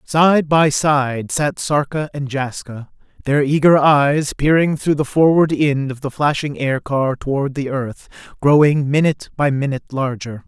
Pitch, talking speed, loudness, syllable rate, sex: 140 Hz, 155 wpm, -17 LUFS, 4.3 syllables/s, male